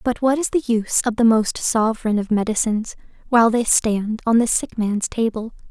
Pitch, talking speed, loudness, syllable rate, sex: 225 Hz, 200 wpm, -19 LUFS, 5.4 syllables/s, female